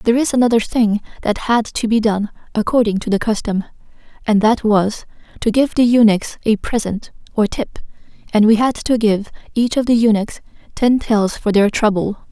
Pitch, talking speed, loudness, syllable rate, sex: 220 Hz, 185 wpm, -16 LUFS, 5.0 syllables/s, female